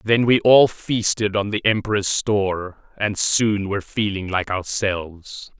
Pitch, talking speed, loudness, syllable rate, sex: 100 Hz, 150 wpm, -20 LUFS, 4.1 syllables/s, male